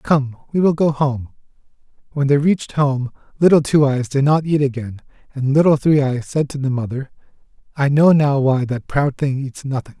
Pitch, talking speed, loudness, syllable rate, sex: 140 Hz, 200 wpm, -17 LUFS, 5.1 syllables/s, male